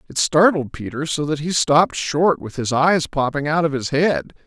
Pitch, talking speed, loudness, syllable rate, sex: 150 Hz, 215 wpm, -19 LUFS, 4.8 syllables/s, male